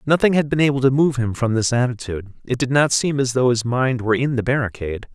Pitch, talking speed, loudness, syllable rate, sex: 125 Hz, 255 wpm, -19 LUFS, 6.5 syllables/s, male